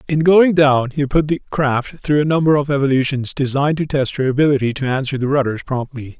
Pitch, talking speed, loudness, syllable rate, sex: 140 Hz, 215 wpm, -17 LUFS, 5.7 syllables/s, male